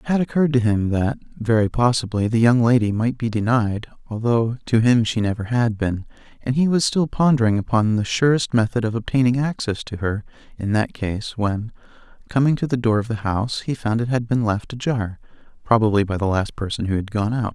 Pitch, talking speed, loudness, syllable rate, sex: 115 Hz, 210 wpm, -21 LUFS, 5.6 syllables/s, male